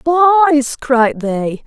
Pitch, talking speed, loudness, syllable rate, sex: 275 Hz, 110 wpm, -13 LUFS, 2.9 syllables/s, female